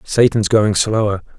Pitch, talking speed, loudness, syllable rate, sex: 105 Hz, 130 wpm, -15 LUFS, 4.3 syllables/s, male